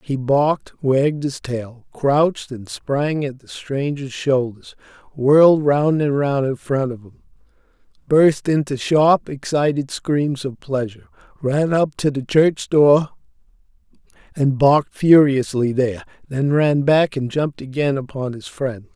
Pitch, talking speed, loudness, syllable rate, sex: 140 Hz, 145 wpm, -18 LUFS, 4.1 syllables/s, male